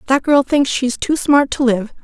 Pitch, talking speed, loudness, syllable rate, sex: 265 Hz, 235 wpm, -15 LUFS, 4.5 syllables/s, female